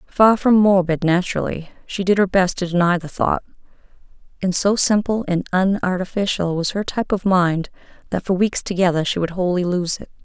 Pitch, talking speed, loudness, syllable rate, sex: 185 Hz, 180 wpm, -19 LUFS, 5.4 syllables/s, female